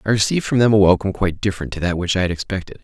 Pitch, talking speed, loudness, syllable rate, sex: 100 Hz, 295 wpm, -18 LUFS, 8.5 syllables/s, male